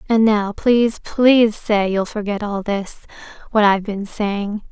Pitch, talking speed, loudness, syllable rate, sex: 210 Hz, 155 wpm, -18 LUFS, 4.4 syllables/s, female